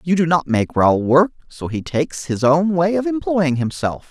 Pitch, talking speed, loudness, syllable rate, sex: 160 Hz, 220 wpm, -18 LUFS, 4.7 syllables/s, male